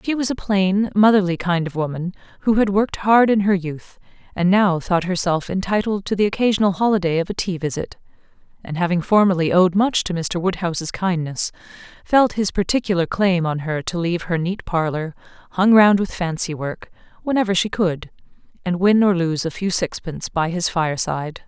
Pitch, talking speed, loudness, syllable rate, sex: 185 Hz, 185 wpm, -19 LUFS, 5.4 syllables/s, female